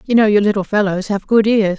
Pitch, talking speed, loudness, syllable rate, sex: 205 Hz, 270 wpm, -15 LUFS, 5.9 syllables/s, female